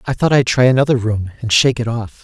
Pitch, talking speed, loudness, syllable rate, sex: 120 Hz, 270 wpm, -15 LUFS, 6.3 syllables/s, male